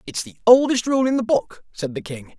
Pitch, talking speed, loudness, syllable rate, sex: 225 Hz, 250 wpm, -19 LUFS, 5.1 syllables/s, male